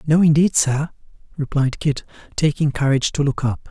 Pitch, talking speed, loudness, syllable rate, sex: 145 Hz, 160 wpm, -19 LUFS, 5.3 syllables/s, male